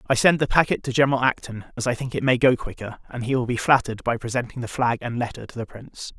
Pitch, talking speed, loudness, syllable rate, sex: 120 Hz, 270 wpm, -22 LUFS, 6.7 syllables/s, male